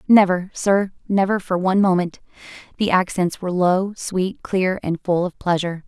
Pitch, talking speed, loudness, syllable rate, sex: 185 Hz, 165 wpm, -20 LUFS, 4.9 syllables/s, female